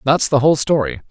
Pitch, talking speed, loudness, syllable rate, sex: 140 Hz, 220 wpm, -16 LUFS, 6.5 syllables/s, male